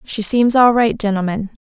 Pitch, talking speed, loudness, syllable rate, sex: 220 Hz, 185 wpm, -15 LUFS, 4.9 syllables/s, female